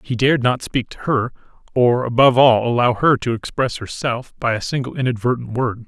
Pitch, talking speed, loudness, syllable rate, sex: 120 Hz, 195 wpm, -18 LUFS, 5.7 syllables/s, male